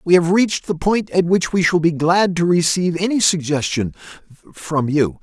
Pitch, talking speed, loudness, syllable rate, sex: 170 Hz, 185 wpm, -17 LUFS, 5.1 syllables/s, male